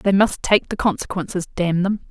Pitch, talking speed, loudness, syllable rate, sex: 190 Hz, 200 wpm, -20 LUFS, 5.7 syllables/s, female